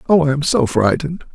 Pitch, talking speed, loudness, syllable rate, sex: 150 Hz, 225 wpm, -16 LUFS, 6.3 syllables/s, male